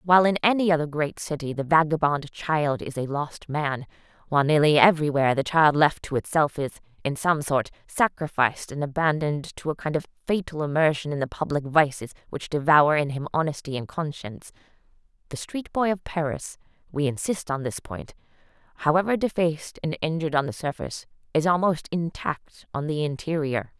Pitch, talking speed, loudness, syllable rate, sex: 150 Hz, 170 wpm, -24 LUFS, 5.5 syllables/s, female